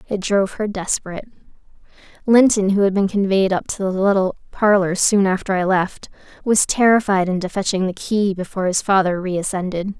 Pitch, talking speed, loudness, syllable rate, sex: 195 Hz, 175 wpm, -18 LUFS, 5.7 syllables/s, female